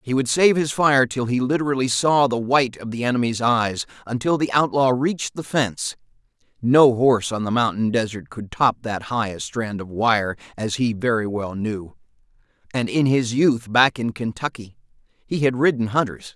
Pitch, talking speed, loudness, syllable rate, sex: 120 Hz, 185 wpm, -21 LUFS, 5.0 syllables/s, male